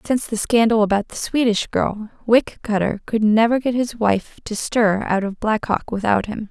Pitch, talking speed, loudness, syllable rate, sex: 220 Hz, 205 wpm, -19 LUFS, 4.7 syllables/s, female